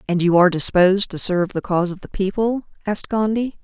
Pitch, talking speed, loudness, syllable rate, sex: 195 Hz, 215 wpm, -19 LUFS, 6.4 syllables/s, female